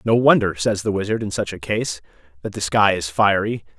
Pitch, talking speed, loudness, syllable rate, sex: 100 Hz, 220 wpm, -20 LUFS, 5.4 syllables/s, male